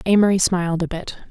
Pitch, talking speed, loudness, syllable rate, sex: 180 Hz, 185 wpm, -19 LUFS, 6.5 syllables/s, female